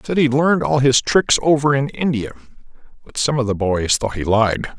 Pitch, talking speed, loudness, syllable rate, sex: 125 Hz, 215 wpm, -17 LUFS, 5.4 syllables/s, male